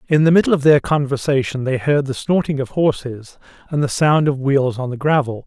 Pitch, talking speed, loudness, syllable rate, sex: 140 Hz, 220 wpm, -17 LUFS, 5.4 syllables/s, male